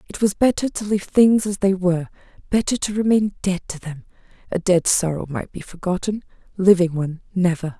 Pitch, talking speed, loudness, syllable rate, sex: 190 Hz, 160 wpm, -20 LUFS, 5.7 syllables/s, female